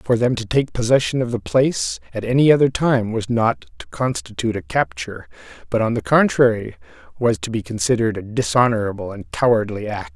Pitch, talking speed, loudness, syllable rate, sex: 120 Hz, 185 wpm, -19 LUFS, 5.8 syllables/s, male